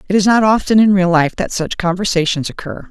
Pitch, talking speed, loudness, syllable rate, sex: 190 Hz, 225 wpm, -14 LUFS, 6.0 syllables/s, female